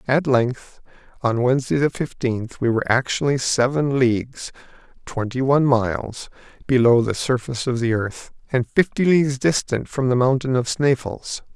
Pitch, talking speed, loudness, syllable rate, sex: 130 Hz, 150 wpm, -20 LUFS, 4.6 syllables/s, male